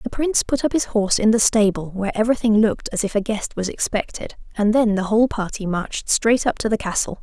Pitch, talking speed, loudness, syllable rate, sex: 215 Hz, 240 wpm, -20 LUFS, 6.2 syllables/s, female